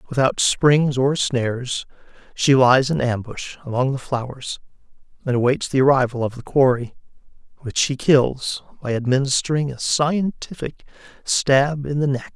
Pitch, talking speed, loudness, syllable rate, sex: 135 Hz, 140 wpm, -20 LUFS, 4.5 syllables/s, male